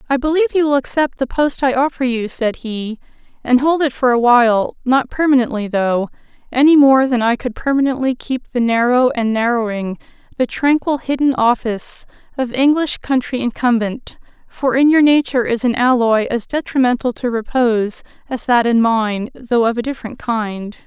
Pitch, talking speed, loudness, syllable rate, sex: 250 Hz, 170 wpm, -16 LUFS, 5.1 syllables/s, female